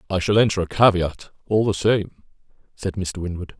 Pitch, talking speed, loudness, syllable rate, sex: 95 Hz, 185 wpm, -21 LUFS, 5.2 syllables/s, male